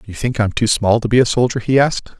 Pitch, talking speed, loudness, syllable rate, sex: 115 Hz, 330 wpm, -16 LUFS, 6.6 syllables/s, male